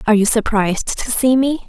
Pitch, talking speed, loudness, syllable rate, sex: 230 Hz, 215 wpm, -16 LUFS, 6.1 syllables/s, female